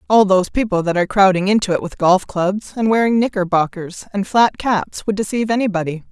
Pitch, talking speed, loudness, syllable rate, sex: 195 Hz, 195 wpm, -17 LUFS, 5.9 syllables/s, female